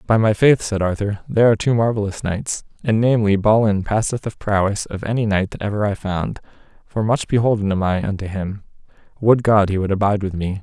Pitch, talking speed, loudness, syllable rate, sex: 105 Hz, 210 wpm, -19 LUFS, 5.8 syllables/s, male